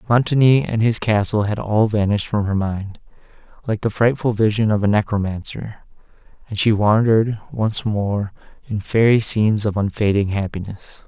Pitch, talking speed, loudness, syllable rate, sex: 105 Hz, 150 wpm, -19 LUFS, 5.0 syllables/s, male